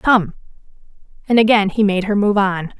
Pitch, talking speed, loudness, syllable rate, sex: 205 Hz, 170 wpm, -16 LUFS, 5.0 syllables/s, female